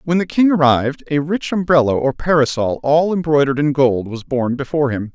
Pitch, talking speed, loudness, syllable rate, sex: 145 Hz, 200 wpm, -16 LUFS, 5.8 syllables/s, male